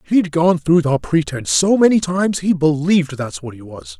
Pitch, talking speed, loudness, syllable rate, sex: 155 Hz, 210 wpm, -16 LUFS, 5.3 syllables/s, male